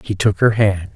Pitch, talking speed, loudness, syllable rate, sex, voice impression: 100 Hz, 250 wpm, -16 LUFS, 4.7 syllables/s, male, very masculine, very adult-like, very middle-aged, very thick, tensed, powerful, bright, soft, slightly muffled, fluent, very cool, very intellectual, sincere, very calm, very mature, very friendly, very reassuring, unique, slightly elegant, wild, sweet, slightly lively, very kind, slightly modest